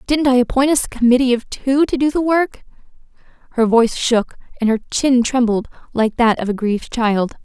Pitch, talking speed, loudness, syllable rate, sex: 245 Hz, 200 wpm, -17 LUFS, 5.3 syllables/s, female